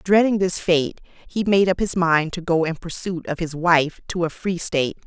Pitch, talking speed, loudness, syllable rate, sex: 175 Hz, 225 wpm, -21 LUFS, 4.9 syllables/s, female